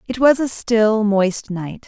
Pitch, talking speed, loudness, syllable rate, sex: 220 Hz, 190 wpm, -17 LUFS, 3.5 syllables/s, female